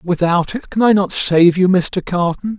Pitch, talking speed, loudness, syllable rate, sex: 185 Hz, 210 wpm, -15 LUFS, 4.3 syllables/s, male